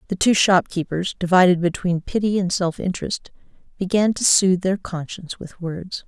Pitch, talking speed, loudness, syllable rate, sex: 185 Hz, 160 wpm, -20 LUFS, 5.2 syllables/s, female